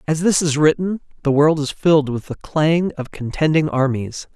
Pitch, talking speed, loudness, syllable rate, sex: 150 Hz, 195 wpm, -18 LUFS, 4.8 syllables/s, male